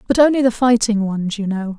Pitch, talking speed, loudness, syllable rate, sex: 220 Hz, 235 wpm, -17 LUFS, 5.5 syllables/s, female